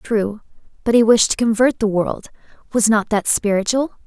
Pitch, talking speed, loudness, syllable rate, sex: 220 Hz, 175 wpm, -17 LUFS, 5.0 syllables/s, female